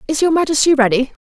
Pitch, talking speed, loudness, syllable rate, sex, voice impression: 285 Hz, 195 wpm, -14 LUFS, 7.0 syllables/s, female, feminine, middle-aged, slightly muffled, slightly unique, intense